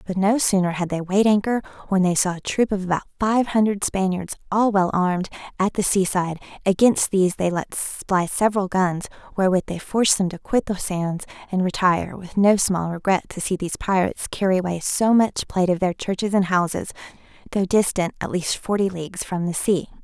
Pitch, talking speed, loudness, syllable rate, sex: 190 Hz, 205 wpm, -21 LUFS, 5.6 syllables/s, female